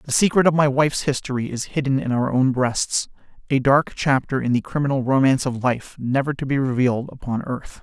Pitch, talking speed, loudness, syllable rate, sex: 135 Hz, 200 wpm, -21 LUFS, 5.7 syllables/s, male